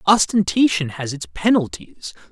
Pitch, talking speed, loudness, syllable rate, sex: 180 Hz, 105 wpm, -19 LUFS, 4.4 syllables/s, male